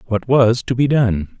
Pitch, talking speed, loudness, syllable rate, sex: 115 Hz, 215 wpm, -16 LUFS, 4.4 syllables/s, male